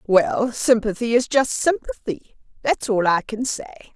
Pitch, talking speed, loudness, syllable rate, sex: 225 Hz, 135 wpm, -21 LUFS, 4.3 syllables/s, female